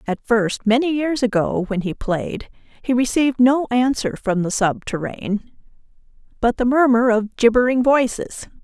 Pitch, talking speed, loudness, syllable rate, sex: 235 Hz, 145 wpm, -19 LUFS, 4.7 syllables/s, female